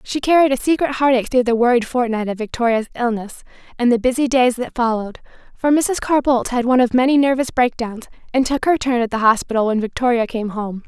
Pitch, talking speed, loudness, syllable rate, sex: 245 Hz, 220 wpm, -18 LUFS, 6.1 syllables/s, female